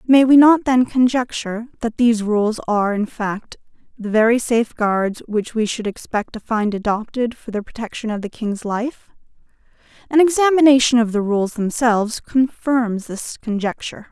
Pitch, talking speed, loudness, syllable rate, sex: 230 Hz, 155 wpm, -18 LUFS, 4.9 syllables/s, female